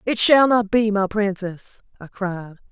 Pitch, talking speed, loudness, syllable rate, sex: 205 Hz, 175 wpm, -19 LUFS, 3.9 syllables/s, female